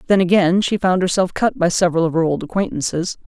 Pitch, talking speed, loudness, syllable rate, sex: 180 Hz, 215 wpm, -18 LUFS, 6.3 syllables/s, female